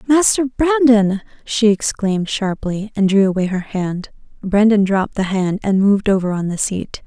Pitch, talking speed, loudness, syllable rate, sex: 200 Hz, 170 wpm, -17 LUFS, 4.8 syllables/s, female